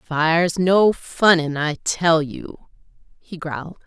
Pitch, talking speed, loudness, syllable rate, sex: 165 Hz, 125 wpm, -19 LUFS, 3.4 syllables/s, female